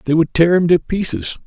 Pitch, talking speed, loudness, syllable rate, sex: 160 Hz, 245 wpm, -16 LUFS, 5.5 syllables/s, male